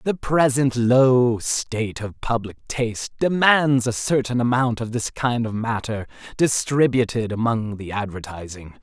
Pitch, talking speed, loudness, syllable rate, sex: 120 Hz, 135 wpm, -21 LUFS, 4.2 syllables/s, male